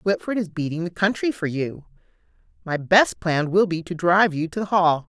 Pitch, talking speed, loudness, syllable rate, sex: 180 Hz, 210 wpm, -21 LUFS, 5.2 syllables/s, female